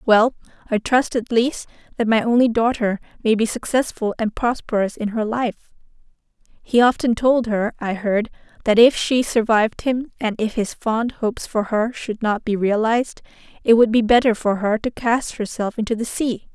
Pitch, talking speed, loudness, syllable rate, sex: 225 Hz, 185 wpm, -20 LUFS, 4.9 syllables/s, female